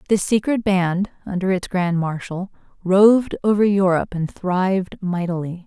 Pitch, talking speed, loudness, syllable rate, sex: 190 Hz, 140 wpm, -20 LUFS, 4.7 syllables/s, female